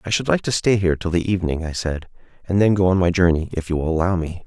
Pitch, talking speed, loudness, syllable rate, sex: 90 Hz, 295 wpm, -20 LUFS, 6.8 syllables/s, male